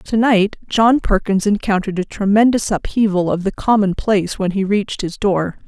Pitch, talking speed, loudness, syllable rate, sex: 200 Hz, 170 wpm, -17 LUFS, 5.1 syllables/s, female